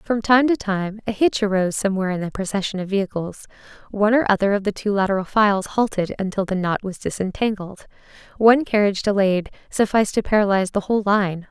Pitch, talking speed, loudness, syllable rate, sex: 200 Hz, 190 wpm, -20 LUFS, 6.4 syllables/s, female